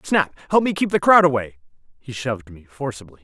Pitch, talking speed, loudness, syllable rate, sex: 135 Hz, 205 wpm, -20 LUFS, 5.9 syllables/s, male